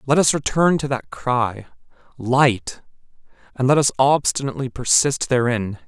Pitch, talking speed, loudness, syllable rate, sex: 130 Hz, 135 wpm, -19 LUFS, 4.5 syllables/s, male